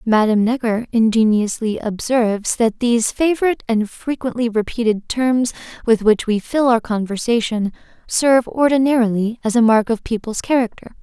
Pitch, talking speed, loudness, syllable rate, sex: 230 Hz, 135 wpm, -18 LUFS, 5.1 syllables/s, female